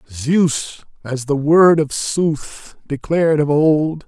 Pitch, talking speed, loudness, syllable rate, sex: 150 Hz, 130 wpm, -16 LUFS, 3.1 syllables/s, male